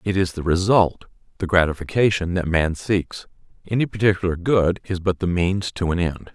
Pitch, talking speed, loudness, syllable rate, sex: 90 Hz, 180 wpm, -21 LUFS, 5.1 syllables/s, male